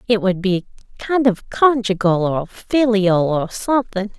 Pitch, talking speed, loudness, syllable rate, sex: 210 Hz, 145 wpm, -18 LUFS, 4.1 syllables/s, female